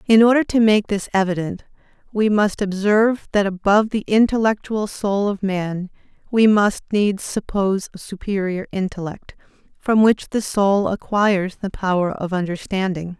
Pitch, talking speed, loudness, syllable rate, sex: 200 Hz, 145 wpm, -19 LUFS, 4.7 syllables/s, female